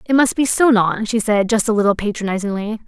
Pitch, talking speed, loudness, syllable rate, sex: 215 Hz, 230 wpm, -17 LUFS, 5.9 syllables/s, female